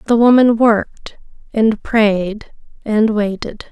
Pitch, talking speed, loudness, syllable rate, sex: 220 Hz, 115 wpm, -14 LUFS, 3.5 syllables/s, female